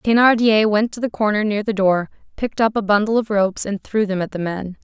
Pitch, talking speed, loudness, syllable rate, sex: 210 Hz, 250 wpm, -18 LUFS, 5.8 syllables/s, female